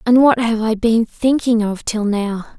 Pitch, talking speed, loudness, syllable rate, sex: 225 Hz, 210 wpm, -16 LUFS, 4.2 syllables/s, female